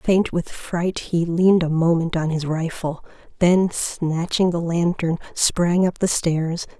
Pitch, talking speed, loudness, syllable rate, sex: 170 Hz, 160 wpm, -21 LUFS, 3.7 syllables/s, female